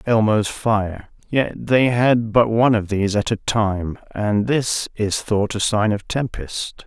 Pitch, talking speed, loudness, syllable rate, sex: 110 Hz, 175 wpm, -20 LUFS, 3.8 syllables/s, male